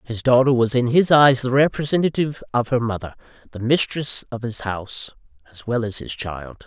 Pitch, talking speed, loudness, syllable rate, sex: 120 Hz, 190 wpm, -20 LUFS, 5.3 syllables/s, male